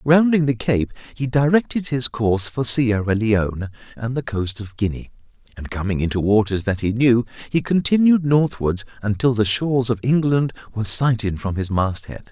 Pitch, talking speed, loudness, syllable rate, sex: 120 Hz, 170 wpm, -20 LUFS, 5.1 syllables/s, male